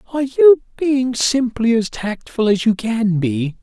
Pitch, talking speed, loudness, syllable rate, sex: 230 Hz, 165 wpm, -17 LUFS, 4.1 syllables/s, male